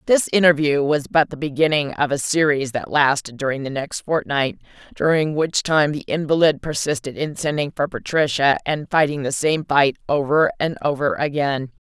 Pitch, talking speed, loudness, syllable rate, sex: 145 Hz, 175 wpm, -20 LUFS, 5.0 syllables/s, female